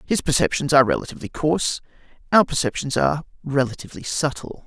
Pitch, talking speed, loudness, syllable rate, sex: 145 Hz, 130 wpm, -21 LUFS, 6.7 syllables/s, male